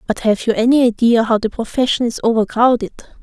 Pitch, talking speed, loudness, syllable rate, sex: 230 Hz, 205 wpm, -15 LUFS, 6.2 syllables/s, female